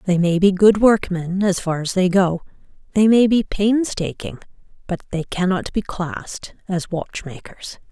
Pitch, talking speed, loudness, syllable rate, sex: 190 Hz, 160 wpm, -19 LUFS, 4.4 syllables/s, female